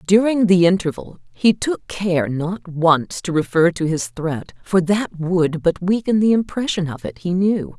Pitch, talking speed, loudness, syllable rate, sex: 180 Hz, 185 wpm, -19 LUFS, 4.2 syllables/s, female